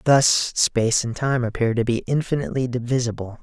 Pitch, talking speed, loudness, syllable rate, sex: 125 Hz, 160 wpm, -21 LUFS, 5.5 syllables/s, male